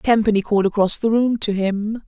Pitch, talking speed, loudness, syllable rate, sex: 215 Hz, 200 wpm, -19 LUFS, 5.5 syllables/s, female